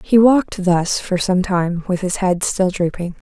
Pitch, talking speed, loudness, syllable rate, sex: 185 Hz, 200 wpm, -17 LUFS, 4.3 syllables/s, female